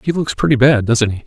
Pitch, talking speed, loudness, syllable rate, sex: 130 Hz, 285 wpm, -14 LUFS, 6.0 syllables/s, male